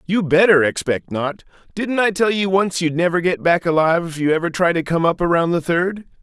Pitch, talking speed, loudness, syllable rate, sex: 175 Hz, 230 wpm, -18 LUFS, 5.5 syllables/s, male